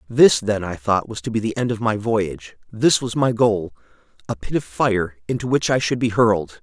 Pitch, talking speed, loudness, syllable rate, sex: 115 Hz, 225 wpm, -20 LUFS, 5.1 syllables/s, male